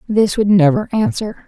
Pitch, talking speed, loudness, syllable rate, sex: 205 Hz, 165 wpm, -15 LUFS, 4.6 syllables/s, female